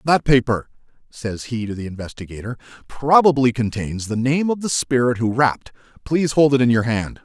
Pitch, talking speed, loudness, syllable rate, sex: 125 Hz, 180 wpm, -19 LUFS, 5.4 syllables/s, male